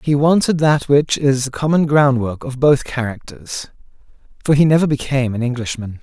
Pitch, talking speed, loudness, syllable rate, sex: 135 Hz, 170 wpm, -16 LUFS, 5.2 syllables/s, male